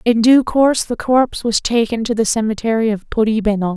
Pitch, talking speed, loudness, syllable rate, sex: 225 Hz, 190 wpm, -16 LUFS, 5.7 syllables/s, female